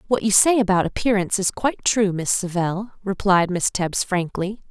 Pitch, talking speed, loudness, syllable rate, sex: 195 Hz, 180 wpm, -20 LUFS, 5.1 syllables/s, female